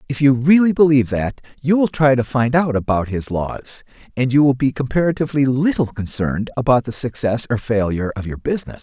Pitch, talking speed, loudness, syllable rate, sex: 130 Hz, 195 wpm, -18 LUFS, 5.9 syllables/s, male